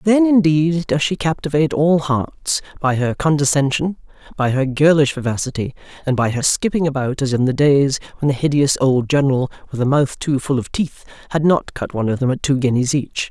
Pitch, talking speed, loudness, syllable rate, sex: 145 Hz, 205 wpm, -18 LUFS, 5.5 syllables/s, female